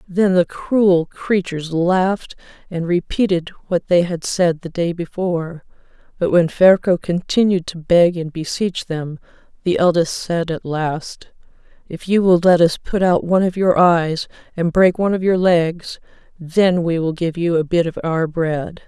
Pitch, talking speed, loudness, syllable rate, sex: 175 Hz, 175 wpm, -17 LUFS, 4.3 syllables/s, female